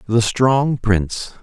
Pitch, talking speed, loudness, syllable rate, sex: 115 Hz, 125 wpm, -17 LUFS, 3.3 syllables/s, male